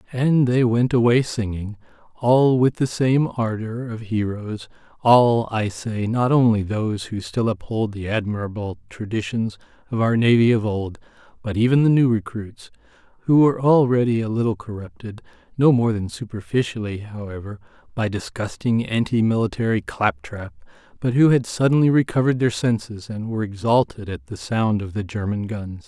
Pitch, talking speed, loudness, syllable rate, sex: 115 Hz, 150 wpm, -21 LUFS, 5.0 syllables/s, male